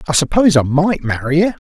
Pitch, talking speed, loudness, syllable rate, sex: 160 Hz, 215 wpm, -15 LUFS, 6.4 syllables/s, male